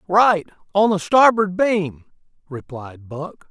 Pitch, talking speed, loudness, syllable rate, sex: 175 Hz, 120 wpm, -17 LUFS, 3.5 syllables/s, male